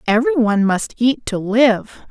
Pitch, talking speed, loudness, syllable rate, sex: 230 Hz, 170 wpm, -17 LUFS, 4.8 syllables/s, female